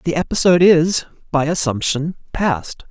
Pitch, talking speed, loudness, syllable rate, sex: 160 Hz, 125 wpm, -17 LUFS, 4.7 syllables/s, male